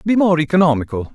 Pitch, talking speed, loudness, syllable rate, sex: 165 Hz, 155 wpm, -16 LUFS, 6.8 syllables/s, male